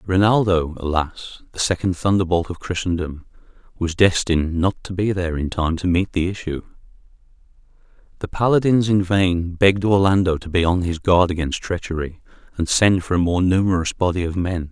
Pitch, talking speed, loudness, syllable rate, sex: 90 Hz, 165 wpm, -20 LUFS, 5.4 syllables/s, male